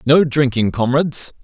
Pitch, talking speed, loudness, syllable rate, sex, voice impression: 135 Hz, 125 wpm, -16 LUFS, 4.8 syllables/s, male, masculine, adult-like, slightly clear, slightly fluent, cool, refreshing, sincere